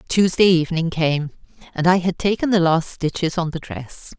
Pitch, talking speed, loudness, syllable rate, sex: 170 Hz, 185 wpm, -19 LUFS, 5.0 syllables/s, female